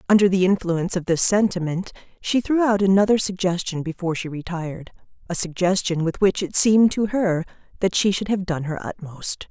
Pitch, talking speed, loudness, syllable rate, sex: 185 Hz, 175 wpm, -21 LUFS, 5.6 syllables/s, female